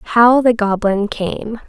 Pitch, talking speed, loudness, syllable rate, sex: 220 Hz, 145 wpm, -15 LUFS, 3.1 syllables/s, female